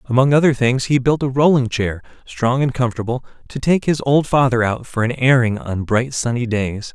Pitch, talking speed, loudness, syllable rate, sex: 125 Hz, 205 wpm, -17 LUFS, 5.2 syllables/s, male